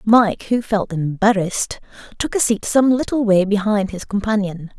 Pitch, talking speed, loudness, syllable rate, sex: 210 Hz, 165 wpm, -18 LUFS, 4.7 syllables/s, female